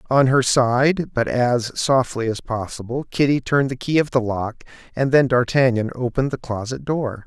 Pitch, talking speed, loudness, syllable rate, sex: 125 Hz, 180 wpm, -20 LUFS, 4.8 syllables/s, male